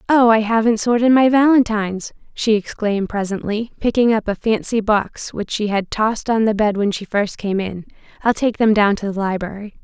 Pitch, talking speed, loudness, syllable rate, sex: 215 Hz, 200 wpm, -18 LUFS, 5.2 syllables/s, female